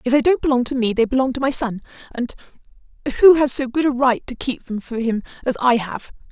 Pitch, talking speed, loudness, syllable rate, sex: 250 Hz, 240 wpm, -19 LUFS, 6.1 syllables/s, female